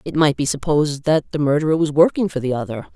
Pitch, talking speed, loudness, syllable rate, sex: 150 Hz, 245 wpm, -19 LUFS, 6.3 syllables/s, female